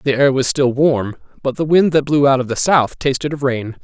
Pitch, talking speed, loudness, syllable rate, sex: 135 Hz, 265 wpm, -16 LUFS, 5.2 syllables/s, male